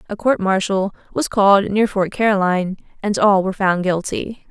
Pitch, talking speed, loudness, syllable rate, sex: 195 Hz, 175 wpm, -18 LUFS, 5.2 syllables/s, female